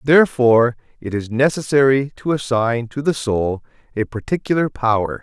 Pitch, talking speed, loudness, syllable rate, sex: 125 Hz, 140 wpm, -18 LUFS, 5.1 syllables/s, male